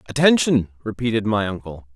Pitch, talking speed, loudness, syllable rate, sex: 110 Hz, 125 wpm, -20 LUFS, 5.8 syllables/s, male